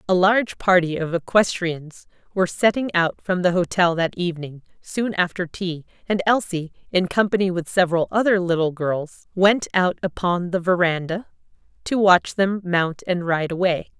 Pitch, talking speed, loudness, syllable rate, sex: 180 Hz, 160 wpm, -21 LUFS, 4.8 syllables/s, female